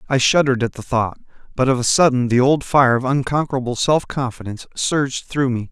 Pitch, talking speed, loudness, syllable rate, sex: 130 Hz, 200 wpm, -18 LUFS, 5.9 syllables/s, male